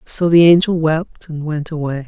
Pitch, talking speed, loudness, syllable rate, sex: 160 Hz, 200 wpm, -15 LUFS, 4.7 syllables/s, male